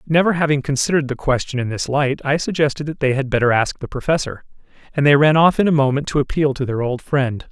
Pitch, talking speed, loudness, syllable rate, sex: 140 Hz, 240 wpm, -18 LUFS, 6.3 syllables/s, male